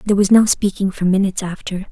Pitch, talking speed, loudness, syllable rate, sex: 195 Hz, 220 wpm, -16 LUFS, 6.9 syllables/s, female